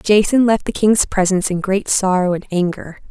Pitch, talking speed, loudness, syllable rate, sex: 195 Hz, 195 wpm, -16 LUFS, 5.1 syllables/s, female